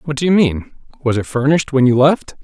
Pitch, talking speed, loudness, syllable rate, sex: 135 Hz, 220 wpm, -15 LUFS, 6.0 syllables/s, male